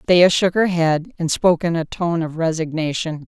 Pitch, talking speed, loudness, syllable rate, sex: 165 Hz, 200 wpm, -19 LUFS, 4.9 syllables/s, female